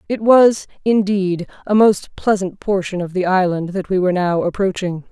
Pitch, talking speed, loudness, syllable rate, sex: 190 Hz, 175 wpm, -17 LUFS, 4.9 syllables/s, female